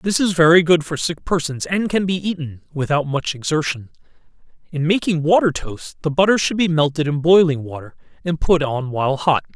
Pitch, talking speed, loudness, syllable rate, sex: 155 Hz, 195 wpm, -18 LUFS, 5.4 syllables/s, male